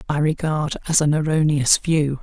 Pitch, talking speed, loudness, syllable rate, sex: 150 Hz, 160 wpm, -19 LUFS, 4.6 syllables/s, male